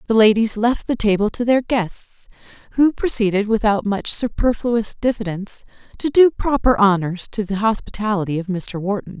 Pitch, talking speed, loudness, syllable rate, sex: 215 Hz, 155 wpm, -19 LUFS, 5.0 syllables/s, female